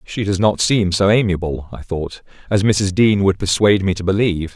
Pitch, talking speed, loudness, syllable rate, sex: 100 Hz, 210 wpm, -17 LUFS, 5.3 syllables/s, male